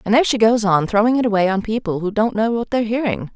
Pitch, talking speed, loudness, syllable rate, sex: 215 Hz, 305 wpm, -18 LUFS, 7.1 syllables/s, female